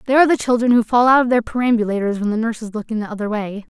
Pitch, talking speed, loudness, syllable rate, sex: 225 Hz, 290 wpm, -17 LUFS, 7.7 syllables/s, female